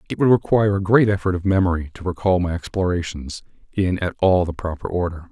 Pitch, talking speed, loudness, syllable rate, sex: 90 Hz, 205 wpm, -20 LUFS, 6.1 syllables/s, male